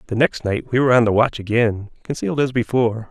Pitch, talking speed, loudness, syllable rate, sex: 120 Hz, 230 wpm, -19 LUFS, 6.5 syllables/s, male